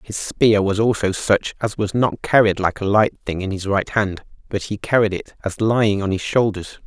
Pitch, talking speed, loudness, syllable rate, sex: 105 Hz, 225 wpm, -19 LUFS, 4.9 syllables/s, male